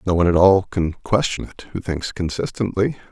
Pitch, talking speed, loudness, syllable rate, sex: 95 Hz, 190 wpm, -20 LUFS, 5.4 syllables/s, male